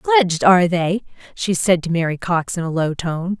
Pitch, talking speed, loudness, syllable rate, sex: 180 Hz, 210 wpm, -18 LUFS, 5.4 syllables/s, female